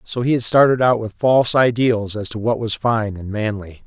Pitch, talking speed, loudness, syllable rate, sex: 115 Hz, 235 wpm, -18 LUFS, 5.1 syllables/s, male